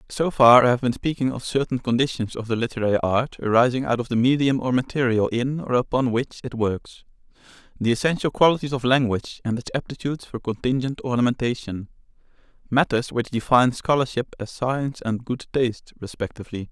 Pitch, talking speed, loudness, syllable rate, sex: 125 Hz, 170 wpm, -22 LUFS, 5.9 syllables/s, male